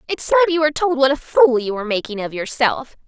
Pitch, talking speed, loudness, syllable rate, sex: 270 Hz, 255 wpm, -18 LUFS, 6.3 syllables/s, female